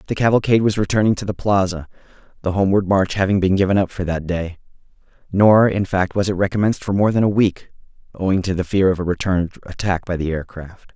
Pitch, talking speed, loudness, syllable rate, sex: 95 Hz, 220 wpm, -18 LUFS, 6.3 syllables/s, male